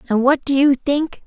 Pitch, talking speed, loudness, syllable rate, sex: 275 Hz, 235 wpm, -17 LUFS, 4.7 syllables/s, female